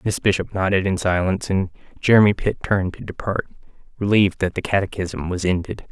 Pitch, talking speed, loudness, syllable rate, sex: 95 Hz, 170 wpm, -21 LUFS, 6.0 syllables/s, male